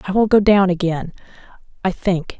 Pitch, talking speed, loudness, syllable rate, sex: 185 Hz, 175 wpm, -17 LUFS, 5.3 syllables/s, female